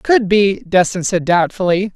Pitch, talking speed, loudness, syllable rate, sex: 190 Hz, 155 wpm, -15 LUFS, 4.3 syllables/s, female